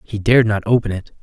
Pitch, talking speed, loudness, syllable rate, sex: 105 Hz, 245 wpm, -16 LUFS, 6.9 syllables/s, male